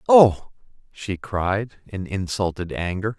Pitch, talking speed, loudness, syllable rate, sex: 100 Hz, 115 wpm, -22 LUFS, 3.7 syllables/s, male